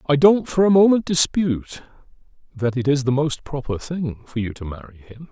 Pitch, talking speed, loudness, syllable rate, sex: 140 Hz, 205 wpm, -20 LUFS, 5.4 syllables/s, male